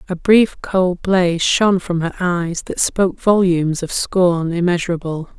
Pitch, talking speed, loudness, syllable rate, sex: 180 Hz, 155 wpm, -17 LUFS, 4.5 syllables/s, female